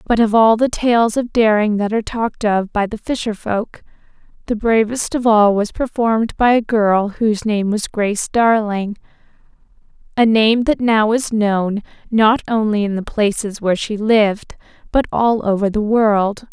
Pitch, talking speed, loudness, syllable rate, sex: 215 Hz, 170 wpm, -16 LUFS, 4.6 syllables/s, female